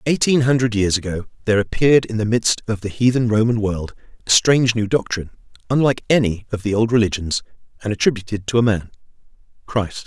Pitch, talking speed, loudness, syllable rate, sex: 110 Hz, 180 wpm, -19 LUFS, 6.3 syllables/s, male